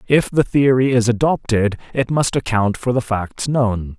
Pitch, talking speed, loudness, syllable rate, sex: 120 Hz, 180 wpm, -18 LUFS, 4.4 syllables/s, male